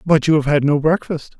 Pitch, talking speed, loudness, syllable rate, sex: 150 Hz, 260 wpm, -16 LUFS, 5.5 syllables/s, male